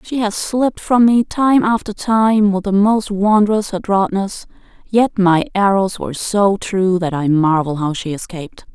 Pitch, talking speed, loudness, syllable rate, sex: 200 Hz, 170 wpm, -16 LUFS, 4.3 syllables/s, female